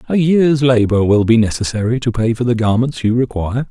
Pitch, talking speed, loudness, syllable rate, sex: 120 Hz, 210 wpm, -15 LUFS, 5.7 syllables/s, male